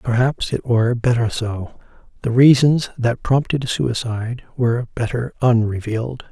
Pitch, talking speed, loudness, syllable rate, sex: 120 Hz, 125 wpm, -19 LUFS, 4.6 syllables/s, male